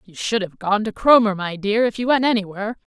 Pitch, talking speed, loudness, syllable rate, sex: 210 Hz, 245 wpm, -19 LUFS, 5.9 syllables/s, female